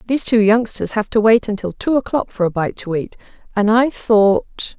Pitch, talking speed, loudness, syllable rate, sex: 215 Hz, 215 wpm, -17 LUFS, 5.3 syllables/s, female